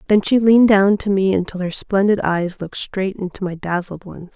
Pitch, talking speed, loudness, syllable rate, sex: 190 Hz, 220 wpm, -18 LUFS, 5.4 syllables/s, female